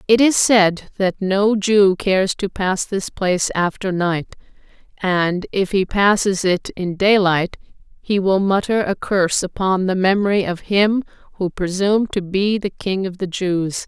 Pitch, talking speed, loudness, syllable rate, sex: 190 Hz, 170 wpm, -18 LUFS, 4.2 syllables/s, female